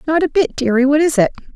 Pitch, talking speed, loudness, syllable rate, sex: 285 Hz, 270 wpm, -15 LUFS, 6.7 syllables/s, female